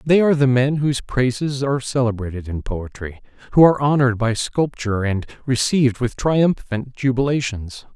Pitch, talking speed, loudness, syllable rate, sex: 125 Hz, 150 wpm, -19 LUFS, 5.4 syllables/s, male